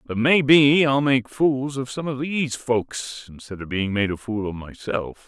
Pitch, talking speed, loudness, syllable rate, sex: 125 Hz, 205 wpm, -21 LUFS, 4.3 syllables/s, male